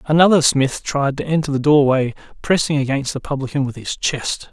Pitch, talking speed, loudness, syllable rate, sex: 140 Hz, 185 wpm, -18 LUFS, 5.3 syllables/s, male